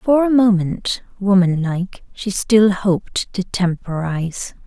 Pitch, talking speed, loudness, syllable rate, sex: 195 Hz, 105 wpm, -18 LUFS, 3.7 syllables/s, female